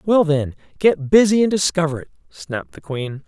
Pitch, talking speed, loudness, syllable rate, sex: 160 Hz, 185 wpm, -18 LUFS, 5.1 syllables/s, male